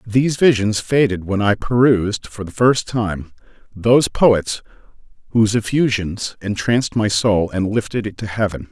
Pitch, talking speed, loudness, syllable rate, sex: 105 Hz, 150 wpm, -18 LUFS, 4.7 syllables/s, male